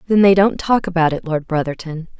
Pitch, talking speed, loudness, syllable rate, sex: 175 Hz, 220 wpm, -16 LUFS, 5.7 syllables/s, female